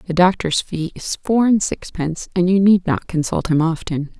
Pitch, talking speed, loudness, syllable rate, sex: 175 Hz, 200 wpm, -18 LUFS, 4.9 syllables/s, female